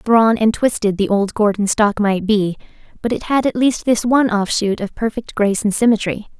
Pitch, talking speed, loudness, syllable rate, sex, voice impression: 215 Hz, 205 wpm, -17 LUFS, 5.2 syllables/s, female, very feminine, young, fluent, cute, slightly refreshing, friendly, slightly kind